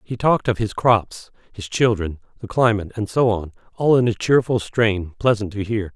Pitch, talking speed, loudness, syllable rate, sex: 110 Hz, 200 wpm, -20 LUFS, 5.1 syllables/s, male